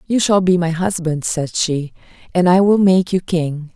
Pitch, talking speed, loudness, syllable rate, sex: 175 Hz, 210 wpm, -16 LUFS, 4.4 syllables/s, female